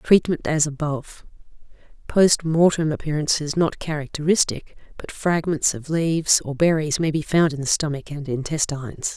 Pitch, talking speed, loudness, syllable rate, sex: 155 Hz, 145 wpm, -21 LUFS, 5.0 syllables/s, female